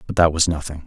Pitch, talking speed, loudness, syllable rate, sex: 80 Hz, 280 wpm, -19 LUFS, 6.9 syllables/s, male